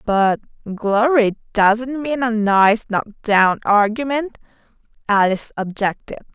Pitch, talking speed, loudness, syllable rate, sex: 220 Hz, 105 wpm, -17 LUFS, 3.7 syllables/s, female